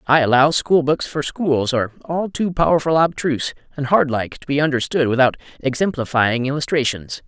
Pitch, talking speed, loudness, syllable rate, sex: 140 Hz, 165 wpm, -19 LUFS, 5.3 syllables/s, male